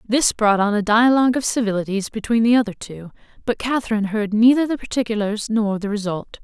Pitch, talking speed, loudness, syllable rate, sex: 220 Hz, 185 wpm, -19 LUFS, 5.9 syllables/s, female